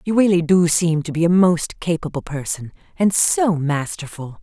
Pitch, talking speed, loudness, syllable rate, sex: 170 Hz, 165 wpm, -18 LUFS, 4.7 syllables/s, female